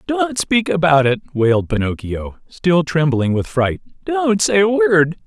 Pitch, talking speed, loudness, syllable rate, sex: 165 Hz, 160 wpm, -17 LUFS, 4.1 syllables/s, male